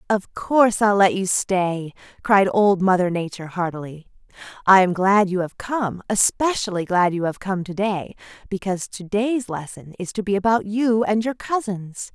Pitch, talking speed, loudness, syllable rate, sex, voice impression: 195 Hz, 175 wpm, -20 LUFS, 4.7 syllables/s, female, very feminine, very adult-like, thin, slightly tensed, slightly powerful, bright, slightly soft, clear, fluent, cute, very intellectual, very refreshing, sincere, calm, very friendly, very reassuring, very unique, very elegant, slightly wild, sweet, very lively, kind, slightly intense